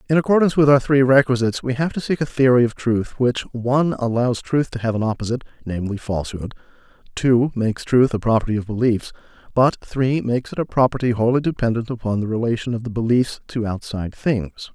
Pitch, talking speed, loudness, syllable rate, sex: 120 Hz, 195 wpm, -20 LUFS, 6.6 syllables/s, male